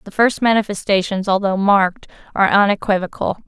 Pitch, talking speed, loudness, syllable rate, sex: 200 Hz, 120 wpm, -17 LUFS, 5.9 syllables/s, female